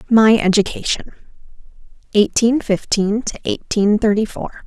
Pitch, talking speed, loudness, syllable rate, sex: 215 Hz, 105 wpm, -17 LUFS, 4.5 syllables/s, female